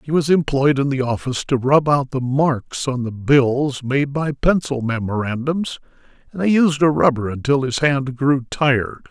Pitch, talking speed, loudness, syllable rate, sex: 135 Hz, 185 wpm, -19 LUFS, 4.6 syllables/s, male